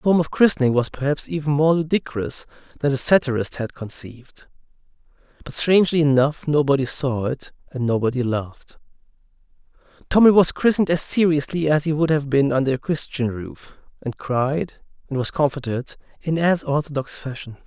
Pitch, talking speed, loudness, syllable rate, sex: 145 Hz, 155 wpm, -20 LUFS, 5.4 syllables/s, male